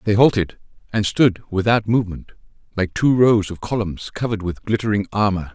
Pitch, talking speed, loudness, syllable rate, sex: 105 Hz, 160 wpm, -19 LUFS, 5.6 syllables/s, male